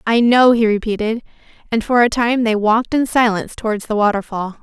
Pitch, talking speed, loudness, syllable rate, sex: 225 Hz, 195 wpm, -16 LUFS, 5.8 syllables/s, female